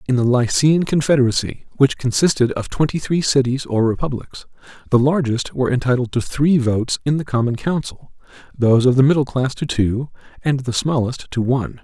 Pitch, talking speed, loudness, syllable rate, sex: 130 Hz, 175 wpm, -18 LUFS, 5.5 syllables/s, male